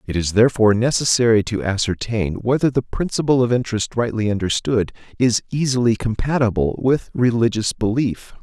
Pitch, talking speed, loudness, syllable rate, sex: 115 Hz, 135 wpm, -19 LUFS, 5.5 syllables/s, male